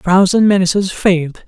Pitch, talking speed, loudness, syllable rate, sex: 185 Hz, 165 wpm, -13 LUFS, 4.9 syllables/s, male